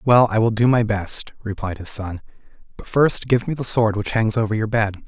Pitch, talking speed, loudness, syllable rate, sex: 110 Hz, 235 wpm, -20 LUFS, 5.1 syllables/s, male